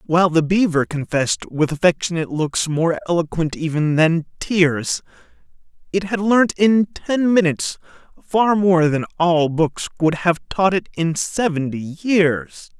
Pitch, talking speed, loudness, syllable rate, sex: 170 Hz, 140 wpm, -19 LUFS, 4.3 syllables/s, male